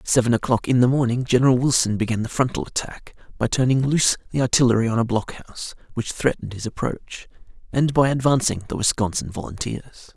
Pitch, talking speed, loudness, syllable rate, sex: 125 Hz, 185 wpm, -21 LUFS, 6.3 syllables/s, male